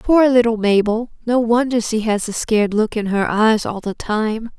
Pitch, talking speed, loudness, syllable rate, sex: 225 Hz, 210 wpm, -17 LUFS, 4.6 syllables/s, female